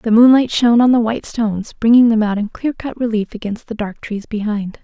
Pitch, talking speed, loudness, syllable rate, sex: 225 Hz, 235 wpm, -16 LUFS, 5.7 syllables/s, female